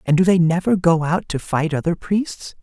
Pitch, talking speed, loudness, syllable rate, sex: 170 Hz, 230 wpm, -19 LUFS, 4.8 syllables/s, male